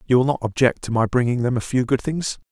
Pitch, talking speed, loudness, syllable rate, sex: 125 Hz, 285 wpm, -21 LUFS, 6.3 syllables/s, male